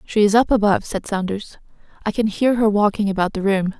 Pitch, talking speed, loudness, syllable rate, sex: 205 Hz, 220 wpm, -19 LUFS, 5.9 syllables/s, female